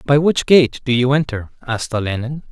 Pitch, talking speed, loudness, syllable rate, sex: 130 Hz, 190 wpm, -17 LUFS, 5.4 syllables/s, male